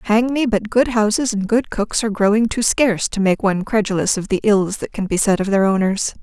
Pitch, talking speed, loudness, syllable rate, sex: 210 Hz, 250 wpm, -18 LUFS, 5.7 syllables/s, female